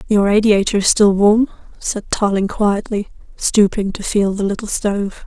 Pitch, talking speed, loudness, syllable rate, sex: 205 Hz, 160 wpm, -16 LUFS, 4.7 syllables/s, female